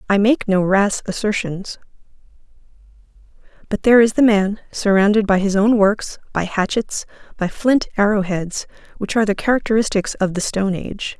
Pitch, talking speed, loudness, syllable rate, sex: 205 Hz, 155 wpm, -18 LUFS, 5.4 syllables/s, female